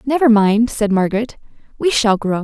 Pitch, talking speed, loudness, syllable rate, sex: 225 Hz, 175 wpm, -15 LUFS, 5.1 syllables/s, female